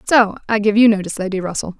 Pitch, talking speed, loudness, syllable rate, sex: 210 Hz, 235 wpm, -16 LUFS, 7.4 syllables/s, female